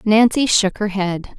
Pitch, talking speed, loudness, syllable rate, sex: 205 Hz, 175 wpm, -17 LUFS, 3.9 syllables/s, female